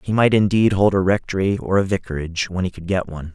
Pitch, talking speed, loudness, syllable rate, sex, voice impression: 95 Hz, 250 wpm, -19 LUFS, 6.5 syllables/s, male, masculine, adult-like, slightly thick, slightly fluent, slightly cool, slightly refreshing, slightly sincere